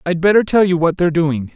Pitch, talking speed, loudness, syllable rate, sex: 170 Hz, 270 wpm, -15 LUFS, 6.3 syllables/s, male